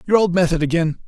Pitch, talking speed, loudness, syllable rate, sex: 175 Hz, 225 wpm, -18 LUFS, 7.1 syllables/s, male